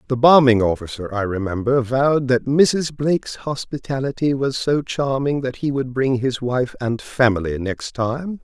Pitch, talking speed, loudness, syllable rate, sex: 130 Hz, 165 wpm, -19 LUFS, 4.5 syllables/s, male